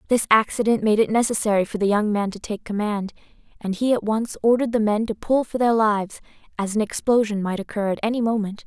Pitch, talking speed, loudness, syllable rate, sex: 215 Hz, 220 wpm, -21 LUFS, 6.1 syllables/s, female